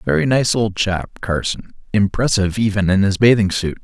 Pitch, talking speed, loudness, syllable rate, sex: 100 Hz, 170 wpm, -17 LUFS, 5.1 syllables/s, male